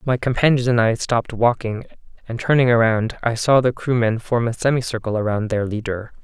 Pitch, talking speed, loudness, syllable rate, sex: 115 Hz, 185 wpm, -19 LUFS, 5.5 syllables/s, male